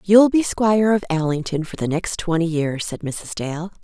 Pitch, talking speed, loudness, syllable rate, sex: 175 Hz, 205 wpm, -20 LUFS, 4.7 syllables/s, female